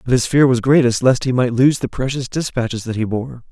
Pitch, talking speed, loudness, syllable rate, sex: 125 Hz, 255 wpm, -17 LUFS, 5.6 syllables/s, male